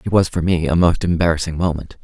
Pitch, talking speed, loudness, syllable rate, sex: 85 Hz, 235 wpm, -18 LUFS, 6.3 syllables/s, male